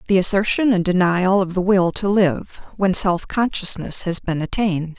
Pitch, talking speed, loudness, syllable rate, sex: 190 Hz, 180 wpm, -18 LUFS, 4.7 syllables/s, female